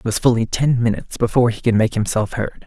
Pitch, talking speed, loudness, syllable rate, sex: 115 Hz, 250 wpm, -18 LUFS, 6.5 syllables/s, male